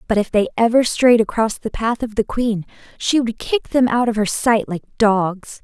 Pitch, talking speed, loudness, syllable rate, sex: 225 Hz, 225 wpm, -18 LUFS, 4.6 syllables/s, female